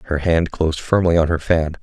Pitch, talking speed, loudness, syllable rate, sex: 80 Hz, 230 wpm, -18 LUFS, 5.8 syllables/s, male